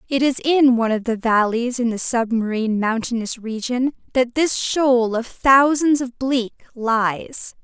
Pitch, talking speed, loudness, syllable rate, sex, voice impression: 245 Hz, 155 wpm, -19 LUFS, 4.1 syllables/s, female, feminine, adult-like, slightly powerful, slightly clear, slightly cute, slightly unique, slightly intense